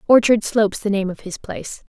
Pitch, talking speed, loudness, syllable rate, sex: 210 Hz, 220 wpm, -19 LUFS, 5.9 syllables/s, female